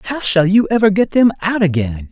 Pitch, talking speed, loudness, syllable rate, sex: 190 Hz, 225 wpm, -14 LUFS, 5.5 syllables/s, male